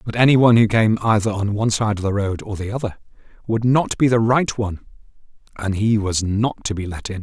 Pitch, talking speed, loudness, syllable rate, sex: 110 Hz, 240 wpm, -19 LUFS, 5.9 syllables/s, male